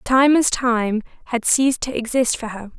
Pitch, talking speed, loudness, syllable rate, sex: 245 Hz, 195 wpm, -19 LUFS, 4.7 syllables/s, female